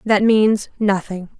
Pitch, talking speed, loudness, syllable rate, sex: 205 Hz, 130 wpm, -17 LUFS, 3.5 syllables/s, female